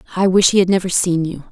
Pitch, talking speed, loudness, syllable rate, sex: 180 Hz, 275 wpm, -15 LUFS, 6.9 syllables/s, female